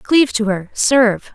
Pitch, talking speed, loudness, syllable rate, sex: 230 Hz, 180 wpm, -15 LUFS, 4.7 syllables/s, female